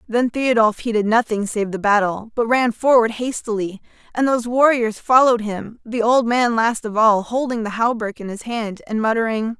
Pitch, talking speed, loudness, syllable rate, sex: 225 Hz, 190 wpm, -19 LUFS, 5.0 syllables/s, female